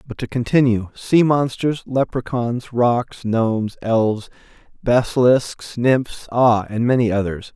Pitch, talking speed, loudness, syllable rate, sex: 120 Hz, 105 wpm, -19 LUFS, 3.9 syllables/s, male